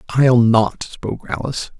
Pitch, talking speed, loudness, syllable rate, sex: 120 Hz, 135 wpm, -17 LUFS, 4.6 syllables/s, male